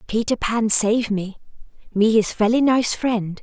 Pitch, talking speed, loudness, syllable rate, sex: 220 Hz, 160 wpm, -19 LUFS, 4.1 syllables/s, female